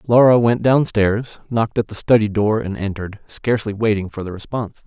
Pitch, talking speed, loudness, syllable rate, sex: 110 Hz, 185 wpm, -18 LUFS, 5.7 syllables/s, male